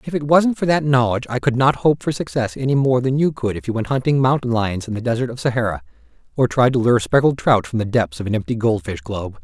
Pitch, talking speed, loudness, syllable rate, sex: 120 Hz, 265 wpm, -19 LUFS, 6.3 syllables/s, male